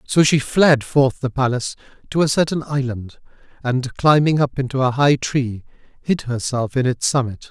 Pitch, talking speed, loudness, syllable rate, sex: 135 Hz, 175 wpm, -19 LUFS, 4.8 syllables/s, male